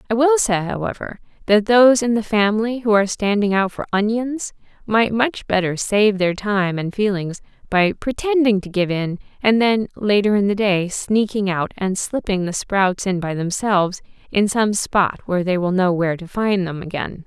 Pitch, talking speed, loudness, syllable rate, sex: 200 Hz, 190 wpm, -19 LUFS, 4.9 syllables/s, female